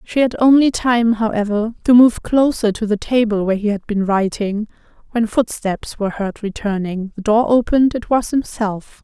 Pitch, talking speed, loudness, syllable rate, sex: 220 Hz, 180 wpm, -17 LUFS, 4.9 syllables/s, female